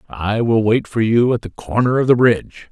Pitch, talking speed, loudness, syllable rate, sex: 115 Hz, 245 wpm, -16 LUFS, 5.2 syllables/s, male